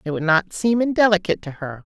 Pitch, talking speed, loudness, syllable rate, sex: 185 Hz, 215 wpm, -19 LUFS, 6.3 syllables/s, female